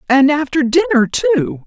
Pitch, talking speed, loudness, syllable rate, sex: 280 Hz, 145 wpm, -14 LUFS, 4.0 syllables/s, female